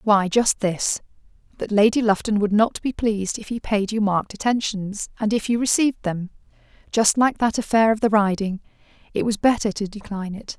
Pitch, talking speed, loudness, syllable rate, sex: 210 Hz, 185 wpm, -21 LUFS, 5.4 syllables/s, female